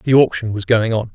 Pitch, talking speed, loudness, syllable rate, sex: 115 Hz, 265 wpm, -17 LUFS, 5.4 syllables/s, male